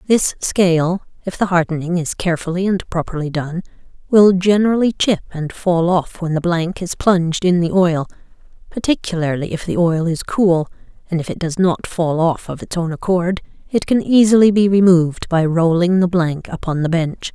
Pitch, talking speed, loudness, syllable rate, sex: 175 Hz, 185 wpm, -17 LUFS, 5.1 syllables/s, female